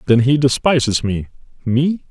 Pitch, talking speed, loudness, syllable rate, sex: 130 Hz, 145 wpm, -16 LUFS, 4.6 syllables/s, male